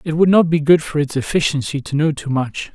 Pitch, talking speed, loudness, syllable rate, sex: 150 Hz, 260 wpm, -17 LUFS, 5.7 syllables/s, male